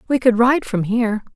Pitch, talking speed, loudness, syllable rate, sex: 230 Hz, 220 wpm, -18 LUFS, 5.5 syllables/s, female